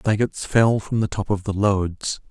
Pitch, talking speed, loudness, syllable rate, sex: 100 Hz, 235 wpm, -21 LUFS, 4.6 syllables/s, male